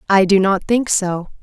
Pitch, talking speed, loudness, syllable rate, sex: 195 Hz, 210 wpm, -16 LUFS, 4.3 syllables/s, female